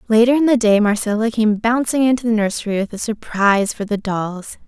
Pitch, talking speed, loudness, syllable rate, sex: 220 Hz, 205 wpm, -17 LUFS, 5.7 syllables/s, female